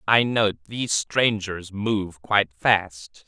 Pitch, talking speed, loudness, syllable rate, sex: 100 Hz, 130 wpm, -23 LUFS, 3.3 syllables/s, male